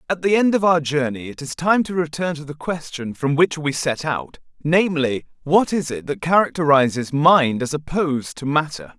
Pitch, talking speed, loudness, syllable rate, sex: 155 Hz, 200 wpm, -20 LUFS, 5.0 syllables/s, male